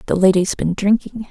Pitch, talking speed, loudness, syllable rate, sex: 200 Hz, 185 wpm, -17 LUFS, 5.4 syllables/s, female